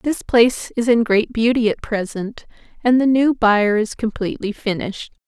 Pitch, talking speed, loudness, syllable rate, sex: 225 Hz, 170 wpm, -18 LUFS, 5.1 syllables/s, female